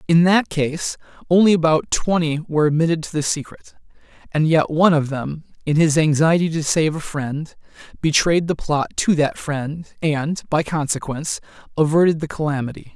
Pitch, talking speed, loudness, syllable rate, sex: 155 Hz, 160 wpm, -19 LUFS, 5.0 syllables/s, male